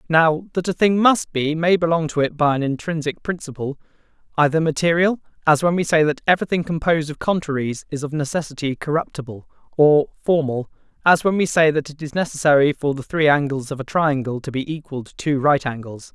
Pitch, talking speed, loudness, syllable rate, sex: 155 Hz, 190 wpm, -20 LUFS, 5.8 syllables/s, male